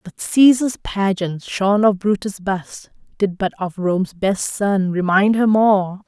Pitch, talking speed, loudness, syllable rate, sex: 195 Hz, 160 wpm, -18 LUFS, 3.8 syllables/s, female